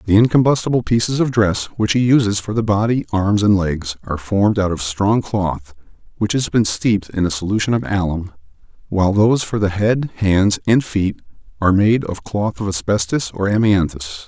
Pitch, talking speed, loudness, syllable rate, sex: 100 Hz, 190 wpm, -17 LUFS, 5.3 syllables/s, male